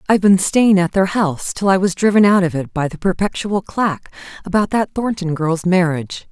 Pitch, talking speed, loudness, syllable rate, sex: 185 Hz, 210 wpm, -16 LUFS, 5.4 syllables/s, female